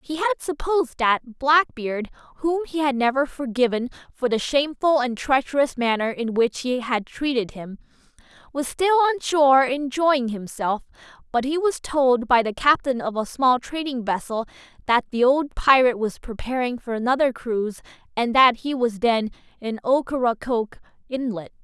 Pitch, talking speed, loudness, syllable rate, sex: 260 Hz, 160 wpm, -22 LUFS, 4.8 syllables/s, female